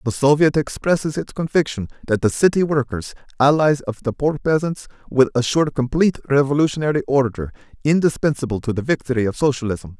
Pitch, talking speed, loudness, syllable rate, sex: 135 Hz, 150 wpm, -19 LUFS, 6.0 syllables/s, male